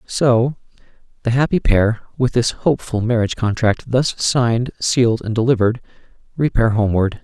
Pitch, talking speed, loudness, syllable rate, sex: 120 Hz, 135 wpm, -18 LUFS, 5.3 syllables/s, male